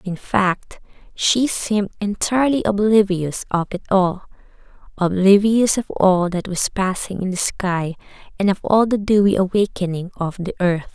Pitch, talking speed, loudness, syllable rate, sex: 195 Hz, 140 wpm, -19 LUFS, 4.5 syllables/s, female